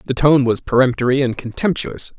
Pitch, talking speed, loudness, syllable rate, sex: 130 Hz, 165 wpm, -17 LUFS, 5.5 syllables/s, male